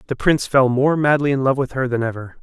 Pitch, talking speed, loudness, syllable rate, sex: 135 Hz, 270 wpm, -18 LUFS, 6.3 syllables/s, male